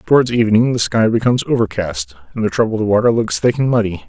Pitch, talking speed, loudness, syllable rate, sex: 110 Hz, 205 wpm, -16 LUFS, 6.4 syllables/s, male